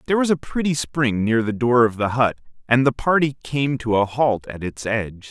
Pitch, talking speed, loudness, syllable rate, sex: 125 Hz, 235 wpm, -20 LUFS, 5.2 syllables/s, male